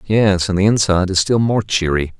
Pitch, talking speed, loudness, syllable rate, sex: 95 Hz, 220 wpm, -16 LUFS, 5.3 syllables/s, male